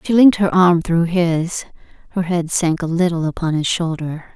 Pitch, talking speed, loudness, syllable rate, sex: 170 Hz, 195 wpm, -17 LUFS, 4.9 syllables/s, female